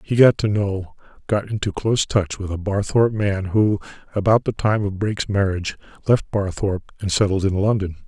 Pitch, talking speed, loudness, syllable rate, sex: 100 Hz, 180 wpm, -21 LUFS, 5.5 syllables/s, male